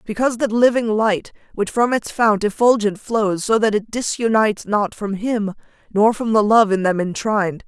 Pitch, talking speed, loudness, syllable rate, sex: 215 Hz, 190 wpm, -18 LUFS, 5.0 syllables/s, female